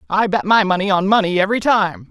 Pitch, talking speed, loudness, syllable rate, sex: 200 Hz, 230 wpm, -16 LUFS, 6.2 syllables/s, female